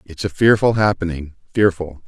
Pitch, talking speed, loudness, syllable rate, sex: 90 Hz, 145 wpm, -17 LUFS, 5.1 syllables/s, male